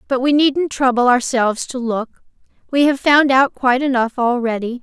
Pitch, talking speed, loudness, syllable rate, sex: 255 Hz, 175 wpm, -16 LUFS, 5.0 syllables/s, female